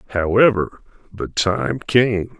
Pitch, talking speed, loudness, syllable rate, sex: 105 Hz, 100 wpm, -18 LUFS, 3.7 syllables/s, male